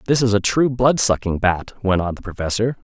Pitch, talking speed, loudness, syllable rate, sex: 110 Hz, 225 wpm, -19 LUFS, 5.5 syllables/s, male